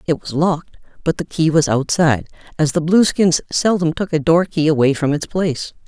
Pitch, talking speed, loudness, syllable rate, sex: 160 Hz, 205 wpm, -17 LUFS, 5.5 syllables/s, female